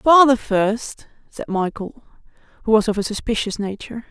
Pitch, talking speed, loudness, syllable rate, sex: 220 Hz, 145 wpm, -19 LUFS, 5.0 syllables/s, female